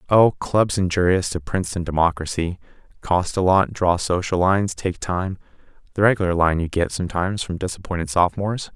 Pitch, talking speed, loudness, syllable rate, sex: 90 Hz, 160 wpm, -21 LUFS, 5.7 syllables/s, male